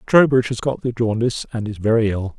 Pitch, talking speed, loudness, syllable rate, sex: 115 Hz, 225 wpm, -19 LUFS, 6.3 syllables/s, male